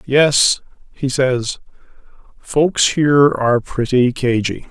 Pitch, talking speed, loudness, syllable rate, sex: 130 Hz, 100 wpm, -16 LUFS, 3.4 syllables/s, male